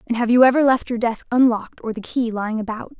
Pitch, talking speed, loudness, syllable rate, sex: 235 Hz, 260 wpm, -19 LUFS, 6.6 syllables/s, female